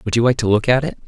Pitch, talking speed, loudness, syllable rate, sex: 115 Hz, 390 wpm, -17 LUFS, 7.7 syllables/s, male